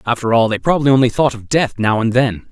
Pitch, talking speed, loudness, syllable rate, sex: 120 Hz, 260 wpm, -15 LUFS, 6.5 syllables/s, male